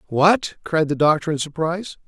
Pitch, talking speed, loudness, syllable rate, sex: 160 Hz, 175 wpm, -20 LUFS, 5.2 syllables/s, male